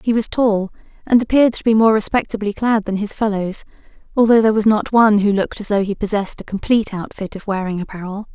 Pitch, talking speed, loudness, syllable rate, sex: 210 Hz, 215 wpm, -17 LUFS, 6.5 syllables/s, female